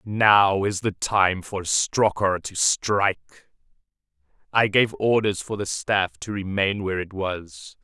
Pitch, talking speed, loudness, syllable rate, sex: 100 Hz, 145 wpm, -22 LUFS, 3.8 syllables/s, male